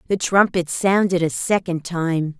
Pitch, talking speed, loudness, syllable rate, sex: 175 Hz, 150 wpm, -19 LUFS, 4.1 syllables/s, female